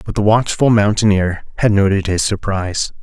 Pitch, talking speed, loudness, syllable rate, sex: 100 Hz, 160 wpm, -15 LUFS, 5.2 syllables/s, male